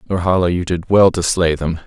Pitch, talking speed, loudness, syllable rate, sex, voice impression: 90 Hz, 195 wpm, -16 LUFS, 5.5 syllables/s, male, very masculine, adult-like, slightly thick, cool, slightly calm, slightly elegant, slightly sweet